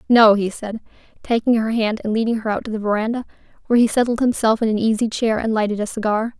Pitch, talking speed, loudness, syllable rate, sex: 220 Hz, 235 wpm, -19 LUFS, 6.5 syllables/s, female